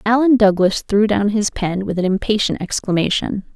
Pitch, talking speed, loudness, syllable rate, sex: 205 Hz, 170 wpm, -17 LUFS, 5.0 syllables/s, female